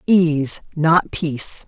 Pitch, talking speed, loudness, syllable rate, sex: 160 Hz, 105 wpm, -19 LUFS, 2.9 syllables/s, female